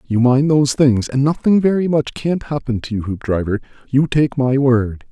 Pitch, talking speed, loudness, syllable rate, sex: 130 Hz, 190 wpm, -17 LUFS, 5.0 syllables/s, male